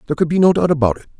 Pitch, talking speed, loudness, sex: 155 Hz, 350 wpm, -16 LUFS, male